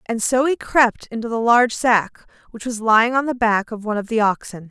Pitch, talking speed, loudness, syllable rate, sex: 230 Hz, 240 wpm, -18 LUFS, 5.6 syllables/s, female